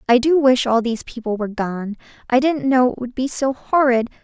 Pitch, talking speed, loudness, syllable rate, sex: 250 Hz, 240 wpm, -19 LUFS, 5.8 syllables/s, female